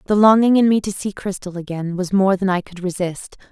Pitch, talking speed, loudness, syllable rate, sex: 190 Hz, 240 wpm, -18 LUFS, 5.6 syllables/s, female